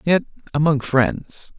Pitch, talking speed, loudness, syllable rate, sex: 150 Hz, 115 wpm, -20 LUFS, 3.6 syllables/s, male